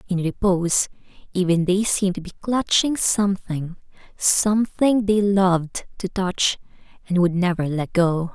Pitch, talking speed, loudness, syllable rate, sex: 185 Hz, 135 wpm, -21 LUFS, 4.5 syllables/s, female